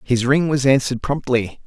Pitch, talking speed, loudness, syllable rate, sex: 130 Hz, 180 wpm, -18 LUFS, 5.2 syllables/s, male